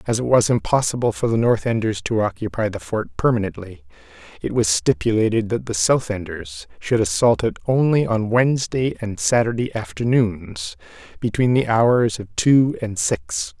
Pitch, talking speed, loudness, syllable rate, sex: 115 Hz, 160 wpm, -20 LUFS, 4.8 syllables/s, male